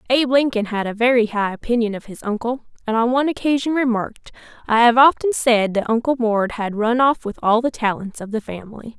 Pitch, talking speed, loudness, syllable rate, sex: 235 Hz, 215 wpm, -19 LUFS, 5.9 syllables/s, female